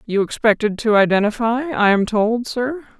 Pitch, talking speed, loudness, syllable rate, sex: 225 Hz, 160 wpm, -18 LUFS, 4.7 syllables/s, female